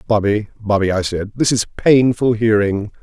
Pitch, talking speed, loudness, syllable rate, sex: 110 Hz, 160 wpm, -16 LUFS, 4.7 syllables/s, male